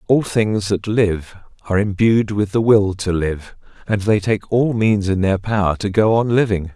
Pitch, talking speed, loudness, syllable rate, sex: 100 Hz, 205 wpm, -17 LUFS, 4.5 syllables/s, male